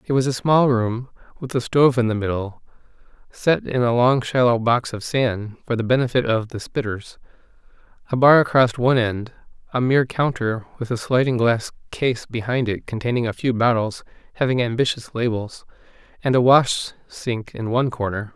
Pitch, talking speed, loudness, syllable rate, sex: 120 Hz, 175 wpm, -20 LUFS, 5.3 syllables/s, male